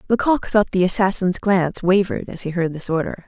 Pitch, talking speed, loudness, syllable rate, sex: 190 Hz, 200 wpm, -19 LUFS, 5.9 syllables/s, female